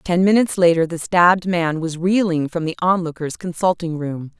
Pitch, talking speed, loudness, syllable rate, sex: 170 Hz, 180 wpm, -18 LUFS, 5.2 syllables/s, female